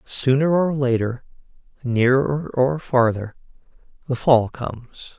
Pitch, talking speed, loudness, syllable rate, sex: 130 Hz, 105 wpm, -20 LUFS, 3.7 syllables/s, male